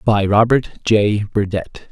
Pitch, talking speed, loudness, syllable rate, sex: 105 Hz, 125 wpm, -17 LUFS, 4.6 syllables/s, male